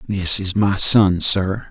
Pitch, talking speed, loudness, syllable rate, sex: 95 Hz, 175 wpm, -15 LUFS, 3.1 syllables/s, male